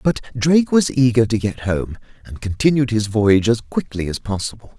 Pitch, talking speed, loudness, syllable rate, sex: 115 Hz, 190 wpm, -18 LUFS, 5.4 syllables/s, male